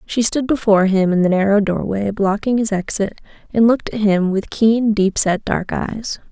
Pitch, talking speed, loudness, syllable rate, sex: 205 Hz, 200 wpm, -17 LUFS, 4.8 syllables/s, female